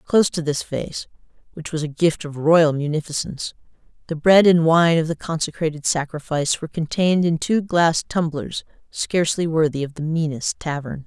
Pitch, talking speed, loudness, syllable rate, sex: 160 Hz, 170 wpm, -20 LUFS, 5.3 syllables/s, female